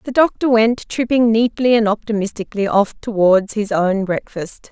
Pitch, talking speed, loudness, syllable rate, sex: 215 Hz, 155 wpm, -17 LUFS, 4.8 syllables/s, female